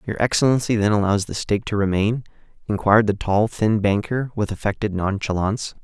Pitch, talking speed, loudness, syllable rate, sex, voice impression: 105 Hz, 165 wpm, -21 LUFS, 5.8 syllables/s, male, masculine, adult-like, slightly refreshing, sincere, slightly elegant, slightly sweet